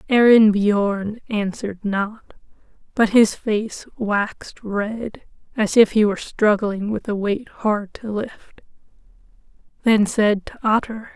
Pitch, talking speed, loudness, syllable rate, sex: 210 Hz, 120 wpm, -20 LUFS, 3.6 syllables/s, female